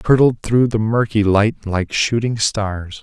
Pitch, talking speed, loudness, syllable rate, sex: 110 Hz, 180 wpm, -17 LUFS, 4.0 syllables/s, male